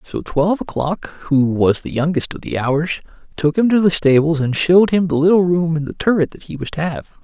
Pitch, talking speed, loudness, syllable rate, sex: 165 Hz, 240 wpm, -17 LUFS, 5.7 syllables/s, male